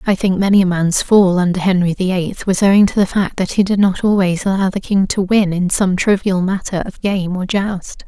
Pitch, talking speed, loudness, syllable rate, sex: 190 Hz, 245 wpm, -15 LUFS, 5.2 syllables/s, female